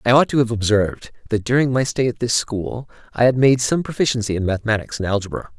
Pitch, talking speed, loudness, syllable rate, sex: 115 Hz, 225 wpm, -19 LUFS, 6.4 syllables/s, male